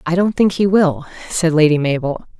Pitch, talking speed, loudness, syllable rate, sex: 170 Hz, 200 wpm, -16 LUFS, 5.2 syllables/s, female